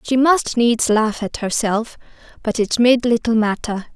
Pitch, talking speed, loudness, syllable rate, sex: 230 Hz, 165 wpm, -18 LUFS, 4.2 syllables/s, female